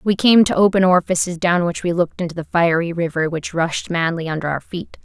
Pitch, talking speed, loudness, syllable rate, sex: 170 Hz, 225 wpm, -18 LUFS, 5.8 syllables/s, female